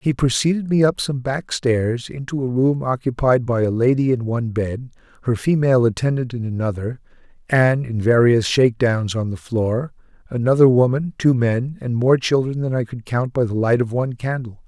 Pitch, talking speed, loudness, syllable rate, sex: 125 Hz, 190 wpm, -19 LUFS, 5.1 syllables/s, male